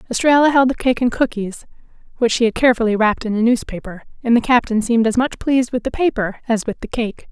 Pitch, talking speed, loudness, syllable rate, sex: 235 Hz, 230 wpm, -17 LUFS, 6.6 syllables/s, female